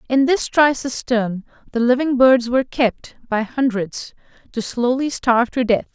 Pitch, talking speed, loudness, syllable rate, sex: 245 Hz, 160 wpm, -18 LUFS, 4.5 syllables/s, female